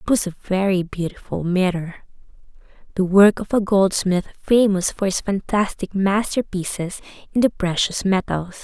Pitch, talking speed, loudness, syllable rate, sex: 195 Hz, 140 wpm, -20 LUFS, 4.7 syllables/s, female